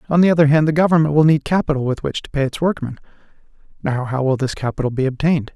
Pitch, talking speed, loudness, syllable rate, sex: 145 Hz, 240 wpm, -18 LUFS, 7.1 syllables/s, male